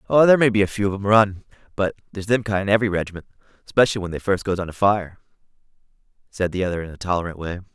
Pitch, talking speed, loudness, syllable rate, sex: 100 Hz, 230 wpm, -21 LUFS, 7.7 syllables/s, male